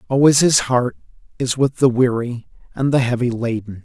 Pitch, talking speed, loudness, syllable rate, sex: 125 Hz, 170 wpm, -18 LUFS, 5.1 syllables/s, male